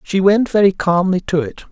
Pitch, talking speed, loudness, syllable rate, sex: 185 Hz, 210 wpm, -15 LUFS, 5.2 syllables/s, male